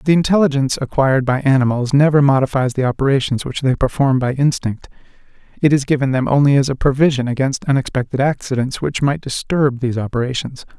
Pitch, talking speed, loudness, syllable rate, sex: 135 Hz, 165 wpm, -16 LUFS, 6.2 syllables/s, male